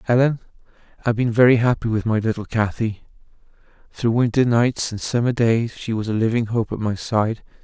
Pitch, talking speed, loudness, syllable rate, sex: 115 Hz, 180 wpm, -20 LUFS, 5.5 syllables/s, male